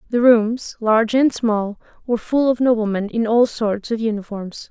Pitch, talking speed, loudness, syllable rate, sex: 225 Hz, 180 wpm, -19 LUFS, 4.7 syllables/s, female